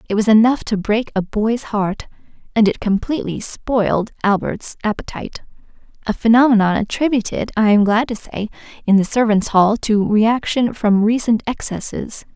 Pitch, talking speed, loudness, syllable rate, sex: 220 Hz, 145 wpm, -17 LUFS, 4.9 syllables/s, female